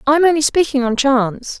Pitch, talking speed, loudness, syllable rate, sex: 275 Hz, 225 wpm, -15 LUFS, 6.2 syllables/s, female